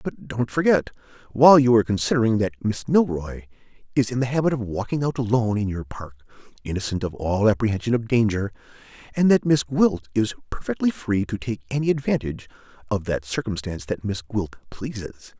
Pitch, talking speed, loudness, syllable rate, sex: 115 Hz, 175 wpm, -22 LUFS, 5.8 syllables/s, male